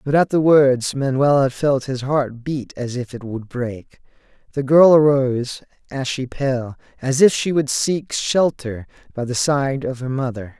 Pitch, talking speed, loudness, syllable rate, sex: 135 Hz, 180 wpm, -19 LUFS, 4.2 syllables/s, male